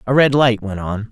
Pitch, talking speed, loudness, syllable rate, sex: 120 Hz, 270 wpm, -16 LUFS, 5.1 syllables/s, male